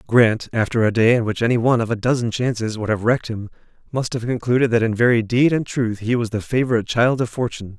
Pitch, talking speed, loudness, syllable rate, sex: 115 Hz, 245 wpm, -19 LUFS, 6.4 syllables/s, male